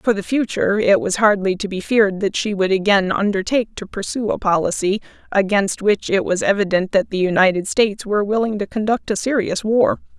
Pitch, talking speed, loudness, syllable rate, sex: 205 Hz, 200 wpm, -18 LUFS, 5.7 syllables/s, female